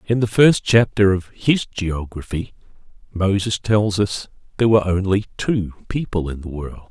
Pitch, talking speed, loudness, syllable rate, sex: 100 Hz, 155 wpm, -19 LUFS, 4.6 syllables/s, male